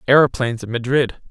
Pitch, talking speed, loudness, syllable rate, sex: 125 Hz, 140 wpm, -18 LUFS, 6.5 syllables/s, male